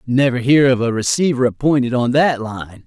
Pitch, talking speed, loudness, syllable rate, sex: 130 Hz, 190 wpm, -16 LUFS, 5.1 syllables/s, male